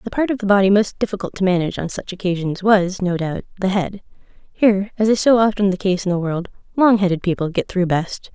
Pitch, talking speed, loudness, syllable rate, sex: 195 Hz, 235 wpm, -18 LUFS, 6.1 syllables/s, female